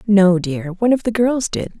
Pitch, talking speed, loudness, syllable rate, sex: 205 Hz, 235 wpm, -17 LUFS, 5.0 syllables/s, female